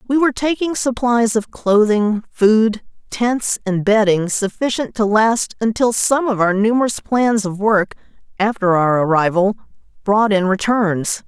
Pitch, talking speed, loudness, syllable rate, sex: 215 Hz, 145 wpm, -16 LUFS, 4.2 syllables/s, female